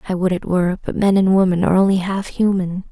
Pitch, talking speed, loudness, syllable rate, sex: 185 Hz, 245 wpm, -17 LUFS, 6.4 syllables/s, female